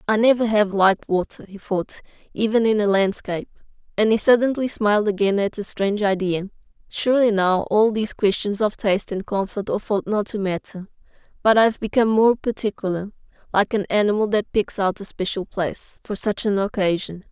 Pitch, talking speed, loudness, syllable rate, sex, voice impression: 205 Hz, 175 wpm, -21 LUFS, 5.5 syllables/s, female, slightly gender-neutral, young, slightly calm, friendly